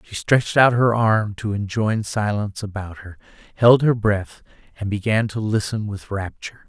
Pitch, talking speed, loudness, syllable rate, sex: 105 Hz, 170 wpm, -20 LUFS, 4.9 syllables/s, male